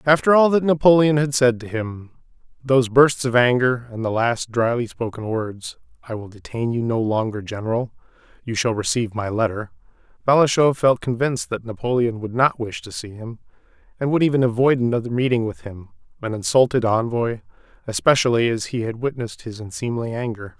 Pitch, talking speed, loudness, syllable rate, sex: 120 Hz, 165 wpm, -20 LUFS, 5.6 syllables/s, male